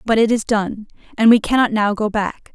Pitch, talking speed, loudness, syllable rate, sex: 215 Hz, 235 wpm, -17 LUFS, 5.1 syllables/s, female